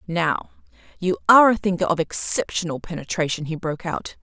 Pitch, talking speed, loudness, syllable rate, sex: 175 Hz, 155 wpm, -21 LUFS, 5.8 syllables/s, female